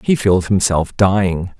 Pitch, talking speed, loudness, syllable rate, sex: 95 Hz, 150 wpm, -15 LUFS, 4.1 syllables/s, male